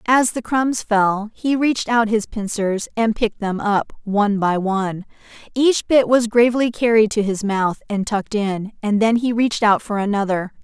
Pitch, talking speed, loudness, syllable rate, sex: 215 Hz, 190 wpm, -19 LUFS, 4.8 syllables/s, female